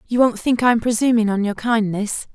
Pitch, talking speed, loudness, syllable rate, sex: 225 Hz, 230 wpm, -18 LUFS, 5.4 syllables/s, female